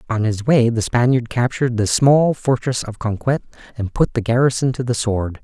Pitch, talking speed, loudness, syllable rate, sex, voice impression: 120 Hz, 200 wpm, -18 LUFS, 5.2 syllables/s, male, slightly masculine, adult-like, soft, slightly muffled, sincere, calm, kind